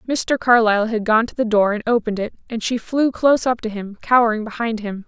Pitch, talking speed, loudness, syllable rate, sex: 225 Hz, 235 wpm, -19 LUFS, 6.1 syllables/s, female